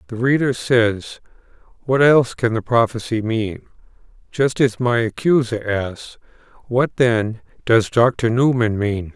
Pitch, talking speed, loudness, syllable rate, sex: 120 Hz, 130 wpm, -18 LUFS, 3.9 syllables/s, male